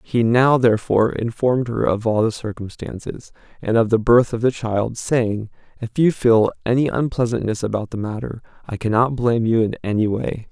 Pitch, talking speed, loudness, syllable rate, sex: 115 Hz, 185 wpm, -19 LUFS, 5.2 syllables/s, male